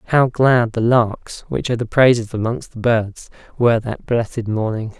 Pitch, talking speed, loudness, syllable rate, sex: 115 Hz, 180 wpm, -18 LUFS, 4.8 syllables/s, male